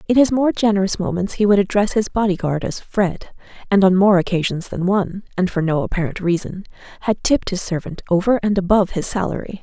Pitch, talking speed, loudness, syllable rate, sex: 195 Hz, 200 wpm, -19 LUFS, 6.0 syllables/s, female